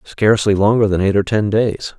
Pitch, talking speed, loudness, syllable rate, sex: 105 Hz, 210 wpm, -15 LUFS, 5.3 syllables/s, male